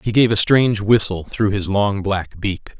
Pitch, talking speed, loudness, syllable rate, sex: 100 Hz, 215 wpm, -18 LUFS, 4.5 syllables/s, male